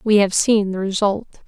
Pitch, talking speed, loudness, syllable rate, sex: 205 Hz, 205 wpm, -18 LUFS, 5.0 syllables/s, female